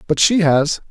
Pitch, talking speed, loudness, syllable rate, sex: 165 Hz, 200 wpm, -15 LUFS, 4.4 syllables/s, male